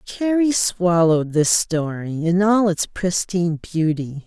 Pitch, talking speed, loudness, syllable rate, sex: 180 Hz, 125 wpm, -19 LUFS, 3.8 syllables/s, female